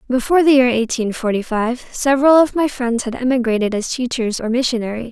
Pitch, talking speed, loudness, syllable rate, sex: 245 Hz, 190 wpm, -17 LUFS, 5.9 syllables/s, female